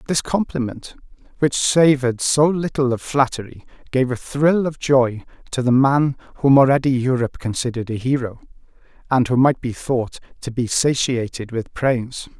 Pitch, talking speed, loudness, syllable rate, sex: 130 Hz, 155 wpm, -19 LUFS, 5.0 syllables/s, male